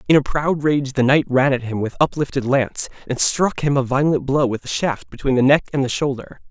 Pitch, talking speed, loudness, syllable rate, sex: 135 Hz, 250 wpm, -19 LUFS, 5.6 syllables/s, male